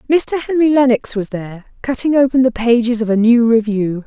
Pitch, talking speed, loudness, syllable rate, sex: 240 Hz, 190 wpm, -14 LUFS, 5.4 syllables/s, female